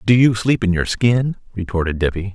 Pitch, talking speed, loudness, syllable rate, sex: 105 Hz, 205 wpm, -18 LUFS, 5.4 syllables/s, male